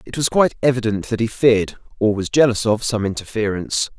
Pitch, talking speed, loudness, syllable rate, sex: 115 Hz, 195 wpm, -19 LUFS, 6.3 syllables/s, male